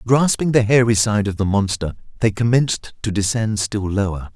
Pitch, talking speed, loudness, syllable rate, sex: 110 Hz, 180 wpm, -19 LUFS, 5.2 syllables/s, male